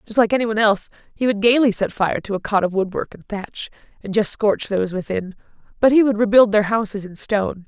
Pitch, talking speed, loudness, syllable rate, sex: 210 Hz, 235 wpm, -19 LUFS, 6.1 syllables/s, female